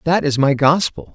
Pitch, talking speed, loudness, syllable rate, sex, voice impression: 145 Hz, 210 wpm, -16 LUFS, 4.9 syllables/s, male, masculine, adult-like, tensed, slightly powerful, clear, mature, friendly, unique, wild, lively, slightly strict, slightly sharp